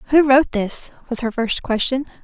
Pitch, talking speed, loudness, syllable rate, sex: 250 Hz, 190 wpm, -19 LUFS, 4.8 syllables/s, female